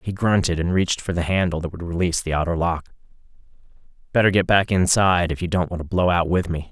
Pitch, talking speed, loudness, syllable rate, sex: 90 Hz, 230 wpm, -21 LUFS, 6.6 syllables/s, male